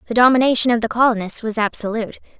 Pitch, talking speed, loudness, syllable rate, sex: 230 Hz, 175 wpm, -17 LUFS, 7.4 syllables/s, female